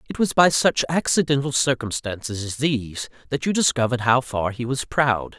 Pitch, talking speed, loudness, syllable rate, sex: 130 Hz, 180 wpm, -21 LUFS, 5.2 syllables/s, male